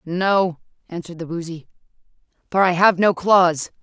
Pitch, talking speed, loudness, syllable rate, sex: 175 Hz, 140 wpm, -18 LUFS, 4.7 syllables/s, female